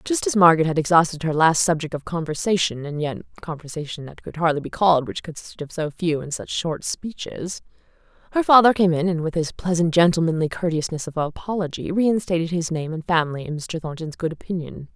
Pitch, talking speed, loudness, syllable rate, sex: 165 Hz, 190 wpm, -22 LUFS, 5.9 syllables/s, female